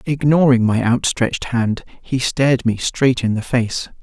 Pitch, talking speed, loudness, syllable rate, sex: 125 Hz, 165 wpm, -17 LUFS, 4.4 syllables/s, male